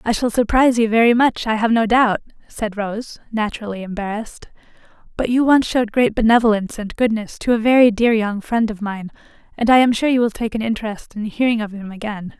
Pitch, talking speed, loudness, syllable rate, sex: 225 Hz, 215 wpm, -18 LUFS, 5.9 syllables/s, female